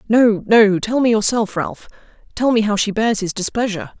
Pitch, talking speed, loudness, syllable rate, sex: 215 Hz, 180 wpm, -17 LUFS, 5.2 syllables/s, female